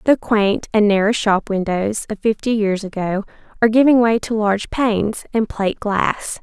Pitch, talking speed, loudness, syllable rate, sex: 215 Hz, 175 wpm, -18 LUFS, 4.9 syllables/s, female